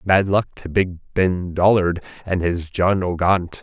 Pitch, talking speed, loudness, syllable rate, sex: 90 Hz, 165 wpm, -20 LUFS, 3.7 syllables/s, male